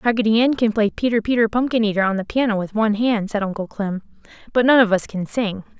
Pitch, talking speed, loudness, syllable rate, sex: 215 Hz, 240 wpm, -19 LUFS, 6.3 syllables/s, female